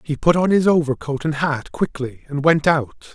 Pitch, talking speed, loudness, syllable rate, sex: 150 Hz, 210 wpm, -19 LUFS, 4.7 syllables/s, male